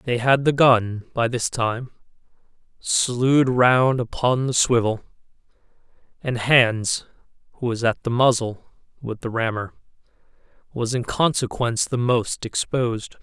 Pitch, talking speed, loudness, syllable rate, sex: 120 Hz, 125 wpm, -21 LUFS, 4.1 syllables/s, male